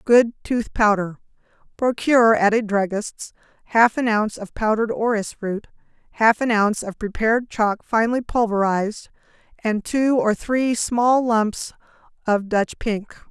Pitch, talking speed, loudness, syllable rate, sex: 220 Hz, 135 wpm, -20 LUFS, 4.5 syllables/s, female